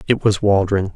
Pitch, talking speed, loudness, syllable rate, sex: 100 Hz, 190 wpm, -17 LUFS, 5.2 syllables/s, male